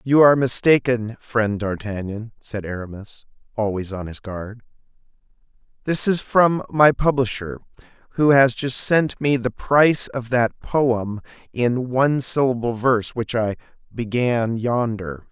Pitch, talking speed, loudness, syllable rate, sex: 120 Hz, 135 wpm, -20 LUFS, 4.2 syllables/s, male